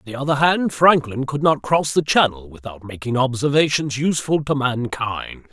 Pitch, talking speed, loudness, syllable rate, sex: 135 Hz, 175 wpm, -19 LUFS, 5.1 syllables/s, male